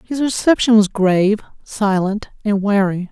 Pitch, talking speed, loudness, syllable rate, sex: 205 Hz, 135 wpm, -16 LUFS, 4.5 syllables/s, female